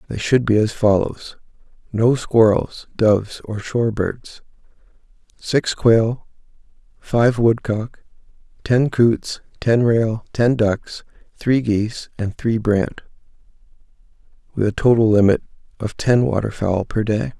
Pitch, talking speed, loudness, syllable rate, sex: 110 Hz, 120 wpm, -18 LUFS, 3.8 syllables/s, male